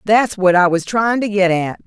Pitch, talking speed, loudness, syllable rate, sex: 200 Hz, 255 wpm, -15 LUFS, 4.6 syllables/s, female